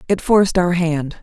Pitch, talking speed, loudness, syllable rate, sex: 175 Hz, 195 wpm, -16 LUFS, 5.0 syllables/s, female